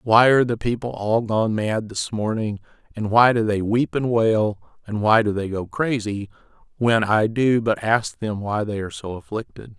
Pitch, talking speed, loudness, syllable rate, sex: 110 Hz, 200 wpm, -21 LUFS, 4.6 syllables/s, male